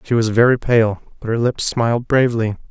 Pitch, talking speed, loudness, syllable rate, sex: 115 Hz, 200 wpm, -17 LUFS, 5.6 syllables/s, male